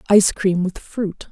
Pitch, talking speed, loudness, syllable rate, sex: 195 Hz, 180 wpm, -19 LUFS, 4.5 syllables/s, female